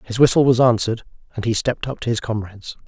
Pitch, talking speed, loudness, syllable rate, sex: 115 Hz, 230 wpm, -19 LUFS, 7.1 syllables/s, male